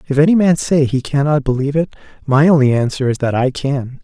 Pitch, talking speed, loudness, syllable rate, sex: 140 Hz, 225 wpm, -15 LUFS, 5.9 syllables/s, male